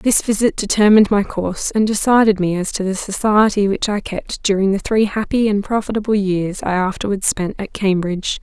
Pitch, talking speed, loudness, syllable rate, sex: 200 Hz, 190 wpm, -17 LUFS, 5.4 syllables/s, female